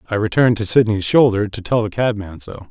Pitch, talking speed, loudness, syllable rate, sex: 110 Hz, 220 wpm, -17 LUFS, 6.1 syllables/s, male